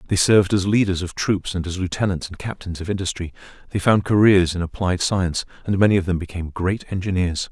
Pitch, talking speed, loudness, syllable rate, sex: 95 Hz, 205 wpm, -21 LUFS, 6.1 syllables/s, male